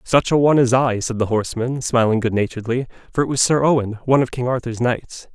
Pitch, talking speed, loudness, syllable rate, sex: 125 Hz, 235 wpm, -19 LUFS, 6.3 syllables/s, male